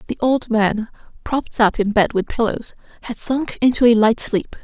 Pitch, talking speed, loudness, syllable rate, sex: 230 Hz, 195 wpm, -18 LUFS, 4.8 syllables/s, female